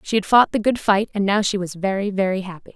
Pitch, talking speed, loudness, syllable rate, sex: 200 Hz, 285 wpm, -19 LUFS, 6.1 syllables/s, female